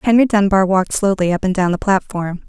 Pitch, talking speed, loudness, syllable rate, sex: 195 Hz, 220 wpm, -16 LUFS, 6.0 syllables/s, female